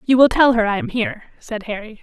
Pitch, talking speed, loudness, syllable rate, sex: 230 Hz, 265 wpm, -17 LUFS, 6.3 syllables/s, female